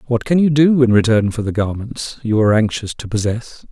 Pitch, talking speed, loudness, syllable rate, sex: 115 Hz, 225 wpm, -16 LUFS, 5.5 syllables/s, male